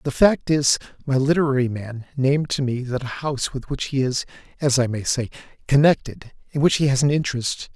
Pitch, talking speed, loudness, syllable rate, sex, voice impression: 135 Hz, 200 wpm, -21 LUFS, 5.6 syllables/s, male, masculine, slightly middle-aged, soft, slightly muffled, sincere, calm, reassuring, slightly sweet, kind